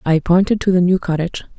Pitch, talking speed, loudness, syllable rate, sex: 180 Hz, 230 wpm, -16 LUFS, 6.6 syllables/s, female